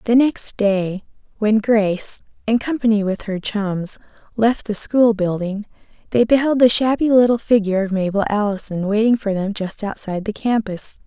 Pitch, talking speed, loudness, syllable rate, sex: 215 Hz, 165 wpm, -18 LUFS, 4.9 syllables/s, female